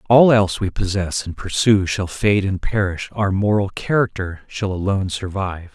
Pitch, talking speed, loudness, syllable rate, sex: 95 Hz, 165 wpm, -19 LUFS, 4.9 syllables/s, male